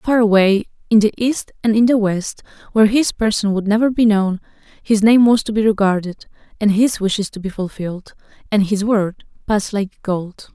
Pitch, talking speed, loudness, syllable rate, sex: 210 Hz, 195 wpm, -17 LUFS, 5.1 syllables/s, female